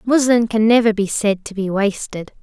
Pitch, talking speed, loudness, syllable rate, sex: 215 Hz, 200 wpm, -17 LUFS, 4.8 syllables/s, female